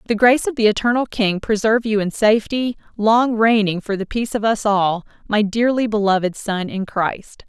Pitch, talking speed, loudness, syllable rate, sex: 215 Hz, 195 wpm, -18 LUFS, 5.3 syllables/s, female